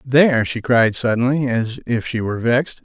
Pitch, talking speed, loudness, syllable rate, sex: 120 Hz, 190 wpm, -18 LUFS, 5.3 syllables/s, male